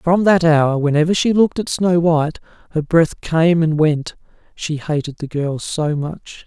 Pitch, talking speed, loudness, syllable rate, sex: 160 Hz, 185 wpm, -17 LUFS, 4.4 syllables/s, male